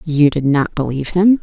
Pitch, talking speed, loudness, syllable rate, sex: 155 Hz, 210 wpm, -16 LUFS, 5.3 syllables/s, female